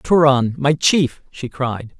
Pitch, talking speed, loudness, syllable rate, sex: 140 Hz, 150 wpm, -17 LUFS, 3.3 syllables/s, male